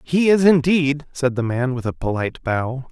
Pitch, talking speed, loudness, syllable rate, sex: 140 Hz, 205 wpm, -19 LUFS, 4.7 syllables/s, male